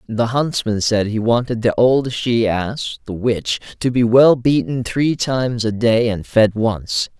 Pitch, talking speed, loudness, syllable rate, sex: 115 Hz, 185 wpm, -17 LUFS, 4.0 syllables/s, male